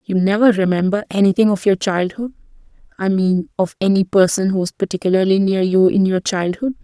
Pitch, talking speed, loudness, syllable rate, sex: 195 Hz, 165 wpm, -17 LUFS, 5.6 syllables/s, female